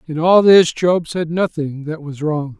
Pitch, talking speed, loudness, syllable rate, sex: 160 Hz, 210 wpm, -15 LUFS, 4.1 syllables/s, male